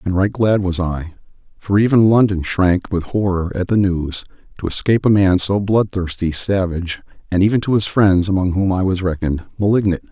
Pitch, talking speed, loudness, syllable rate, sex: 95 Hz, 180 wpm, -17 LUFS, 4.8 syllables/s, male